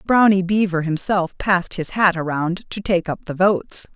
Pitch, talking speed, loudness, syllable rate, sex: 180 Hz, 180 wpm, -19 LUFS, 4.8 syllables/s, female